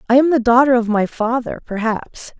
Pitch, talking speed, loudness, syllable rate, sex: 240 Hz, 200 wpm, -16 LUFS, 5.2 syllables/s, female